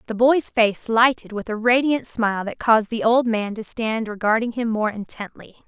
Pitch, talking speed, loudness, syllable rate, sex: 225 Hz, 200 wpm, -20 LUFS, 5.0 syllables/s, female